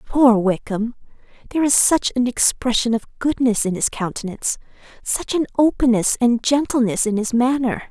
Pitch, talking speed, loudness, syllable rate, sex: 240 Hz, 150 wpm, -19 LUFS, 5.2 syllables/s, female